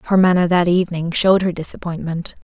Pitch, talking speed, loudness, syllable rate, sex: 175 Hz, 165 wpm, -18 LUFS, 6.0 syllables/s, female